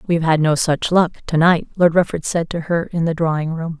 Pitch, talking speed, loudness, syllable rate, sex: 165 Hz, 255 wpm, -18 LUFS, 5.4 syllables/s, female